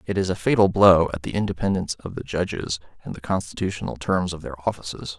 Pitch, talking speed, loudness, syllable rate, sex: 90 Hz, 210 wpm, -23 LUFS, 6.3 syllables/s, male